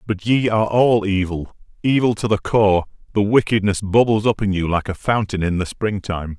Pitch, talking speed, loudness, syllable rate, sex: 105 Hz, 190 wpm, -19 LUFS, 5.1 syllables/s, male